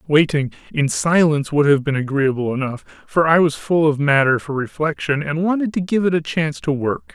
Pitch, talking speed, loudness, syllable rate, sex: 150 Hz, 210 wpm, -18 LUFS, 5.3 syllables/s, male